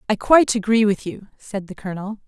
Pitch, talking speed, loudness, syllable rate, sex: 210 Hz, 210 wpm, -19 LUFS, 6.2 syllables/s, female